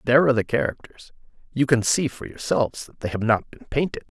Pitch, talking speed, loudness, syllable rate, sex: 125 Hz, 215 wpm, -23 LUFS, 6.3 syllables/s, male